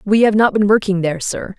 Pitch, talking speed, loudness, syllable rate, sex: 200 Hz, 265 wpm, -15 LUFS, 6.0 syllables/s, female